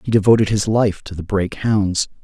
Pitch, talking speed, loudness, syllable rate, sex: 105 Hz, 215 wpm, -17 LUFS, 5.5 syllables/s, male